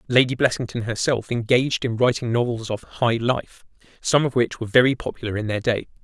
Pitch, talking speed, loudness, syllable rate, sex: 120 Hz, 190 wpm, -22 LUFS, 5.8 syllables/s, male